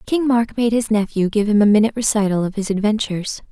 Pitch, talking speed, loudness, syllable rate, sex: 215 Hz, 220 wpm, -18 LUFS, 6.3 syllables/s, female